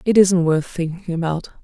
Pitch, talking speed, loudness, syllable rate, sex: 175 Hz, 185 wpm, -19 LUFS, 4.9 syllables/s, female